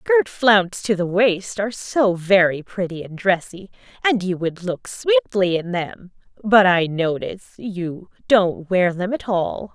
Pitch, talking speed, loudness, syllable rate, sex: 190 Hz, 165 wpm, -20 LUFS, 4.0 syllables/s, female